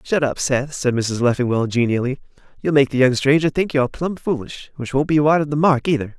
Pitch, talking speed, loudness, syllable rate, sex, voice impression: 135 Hz, 235 wpm, -19 LUFS, 5.7 syllables/s, male, very masculine, adult-like, slightly middle-aged, thick, tensed, powerful, slightly bright, slightly hard, very clear, very fluent, very cool, very intellectual, refreshing, very sincere, very calm, mature, very friendly, very reassuring, unique, slightly elegant, very wild, sweet, slightly lively, kind, slightly modest